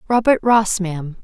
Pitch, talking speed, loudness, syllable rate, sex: 200 Hz, 145 wpm, -17 LUFS, 4.9 syllables/s, female